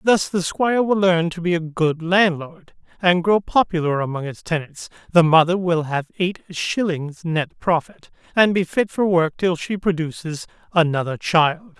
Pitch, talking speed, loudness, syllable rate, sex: 170 Hz, 175 wpm, -20 LUFS, 4.5 syllables/s, male